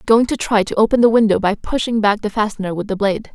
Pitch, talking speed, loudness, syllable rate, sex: 215 Hz, 285 wpm, -17 LUFS, 8.4 syllables/s, female